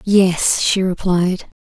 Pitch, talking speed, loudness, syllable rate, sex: 185 Hz, 110 wpm, -16 LUFS, 2.8 syllables/s, female